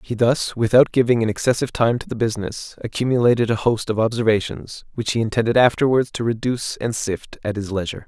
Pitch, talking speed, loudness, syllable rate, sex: 115 Hz, 195 wpm, -20 LUFS, 6.2 syllables/s, male